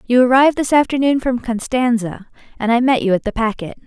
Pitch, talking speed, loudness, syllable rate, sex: 245 Hz, 200 wpm, -16 LUFS, 5.9 syllables/s, female